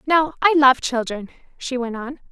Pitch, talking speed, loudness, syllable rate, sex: 265 Hz, 180 wpm, -19 LUFS, 4.6 syllables/s, female